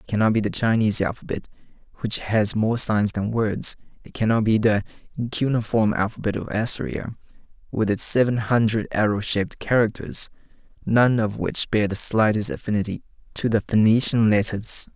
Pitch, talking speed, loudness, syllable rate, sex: 110 Hz, 150 wpm, -21 LUFS, 5.2 syllables/s, male